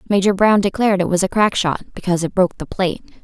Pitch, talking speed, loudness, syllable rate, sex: 190 Hz, 240 wpm, -17 LUFS, 7.3 syllables/s, female